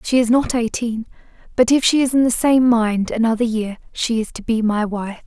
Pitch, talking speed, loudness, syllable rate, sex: 230 Hz, 230 wpm, -18 LUFS, 5.2 syllables/s, female